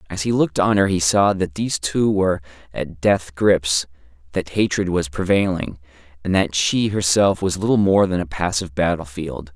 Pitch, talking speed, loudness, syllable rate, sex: 90 Hz, 180 wpm, -19 LUFS, 5.1 syllables/s, male